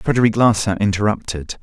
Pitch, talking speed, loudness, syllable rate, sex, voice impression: 105 Hz, 110 wpm, -17 LUFS, 5.7 syllables/s, male, very masculine, very adult-like, very middle-aged, thick, very tensed, powerful, bright, soft, slightly muffled, fluent, slightly raspy, very cool, intellectual, refreshing, very sincere, very calm, mature, very friendly, very reassuring, very unique, elegant, wild, sweet, very lively, kind, slightly intense, slightly modest